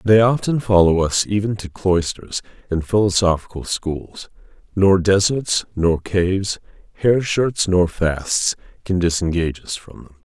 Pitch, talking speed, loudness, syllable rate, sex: 95 Hz, 135 wpm, -19 LUFS, 4.2 syllables/s, male